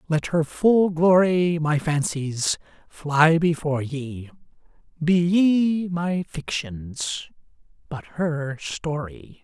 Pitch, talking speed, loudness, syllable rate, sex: 160 Hz, 95 wpm, -22 LUFS, 2.9 syllables/s, male